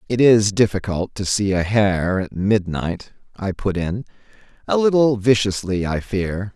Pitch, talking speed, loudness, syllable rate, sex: 100 Hz, 155 wpm, -19 LUFS, 4.2 syllables/s, male